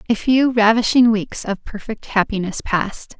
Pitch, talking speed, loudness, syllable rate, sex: 220 Hz, 150 wpm, -18 LUFS, 4.7 syllables/s, female